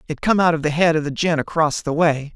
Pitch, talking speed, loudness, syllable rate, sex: 160 Hz, 305 wpm, -19 LUFS, 6.0 syllables/s, male